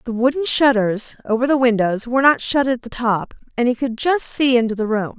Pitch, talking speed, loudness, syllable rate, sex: 245 Hz, 230 wpm, -18 LUFS, 5.4 syllables/s, female